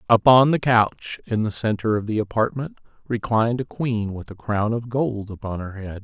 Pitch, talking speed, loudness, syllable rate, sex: 110 Hz, 200 wpm, -22 LUFS, 4.9 syllables/s, male